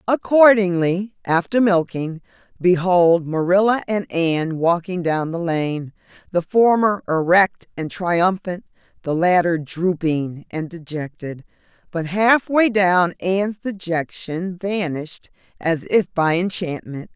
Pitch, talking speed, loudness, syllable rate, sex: 180 Hz, 110 wpm, -19 LUFS, 3.8 syllables/s, female